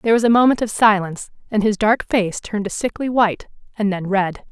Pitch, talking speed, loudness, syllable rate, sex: 210 Hz, 225 wpm, -18 LUFS, 6.0 syllables/s, female